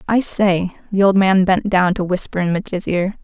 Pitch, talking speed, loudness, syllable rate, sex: 190 Hz, 225 wpm, -17 LUFS, 4.9 syllables/s, female